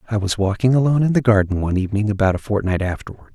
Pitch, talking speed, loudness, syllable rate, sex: 105 Hz, 235 wpm, -18 LUFS, 7.7 syllables/s, male